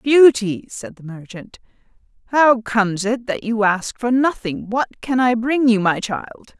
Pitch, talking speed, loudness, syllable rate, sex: 230 Hz, 175 wpm, -18 LUFS, 4.2 syllables/s, female